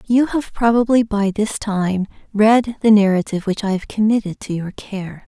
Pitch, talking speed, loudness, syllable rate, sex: 210 Hz, 180 wpm, -18 LUFS, 4.8 syllables/s, female